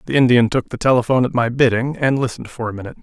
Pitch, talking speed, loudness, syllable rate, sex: 120 Hz, 260 wpm, -17 LUFS, 7.9 syllables/s, male